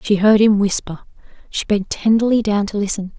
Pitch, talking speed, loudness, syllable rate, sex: 205 Hz, 190 wpm, -17 LUFS, 5.4 syllables/s, female